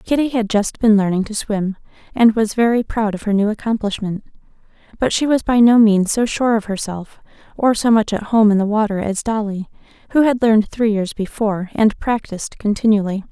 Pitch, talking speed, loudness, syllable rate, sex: 215 Hz, 200 wpm, -17 LUFS, 5.4 syllables/s, female